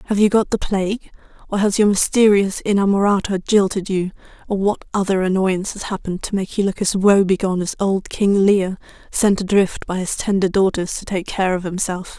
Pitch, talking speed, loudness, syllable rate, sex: 195 Hz, 190 wpm, -18 LUFS, 5.5 syllables/s, female